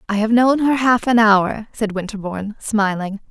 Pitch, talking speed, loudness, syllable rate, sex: 215 Hz, 180 wpm, -17 LUFS, 4.7 syllables/s, female